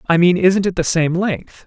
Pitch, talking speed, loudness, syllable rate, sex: 175 Hz, 255 wpm, -16 LUFS, 4.5 syllables/s, male